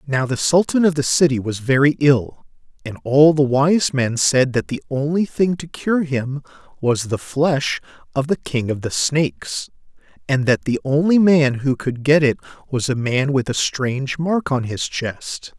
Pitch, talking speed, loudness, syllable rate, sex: 140 Hz, 190 wpm, -18 LUFS, 4.3 syllables/s, male